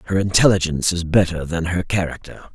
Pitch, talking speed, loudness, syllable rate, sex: 90 Hz, 165 wpm, -19 LUFS, 6.2 syllables/s, male